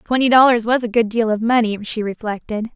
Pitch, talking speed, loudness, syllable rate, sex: 225 Hz, 215 wpm, -17 LUFS, 5.8 syllables/s, female